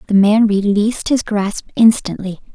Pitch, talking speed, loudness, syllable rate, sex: 210 Hz, 140 wpm, -15 LUFS, 4.7 syllables/s, female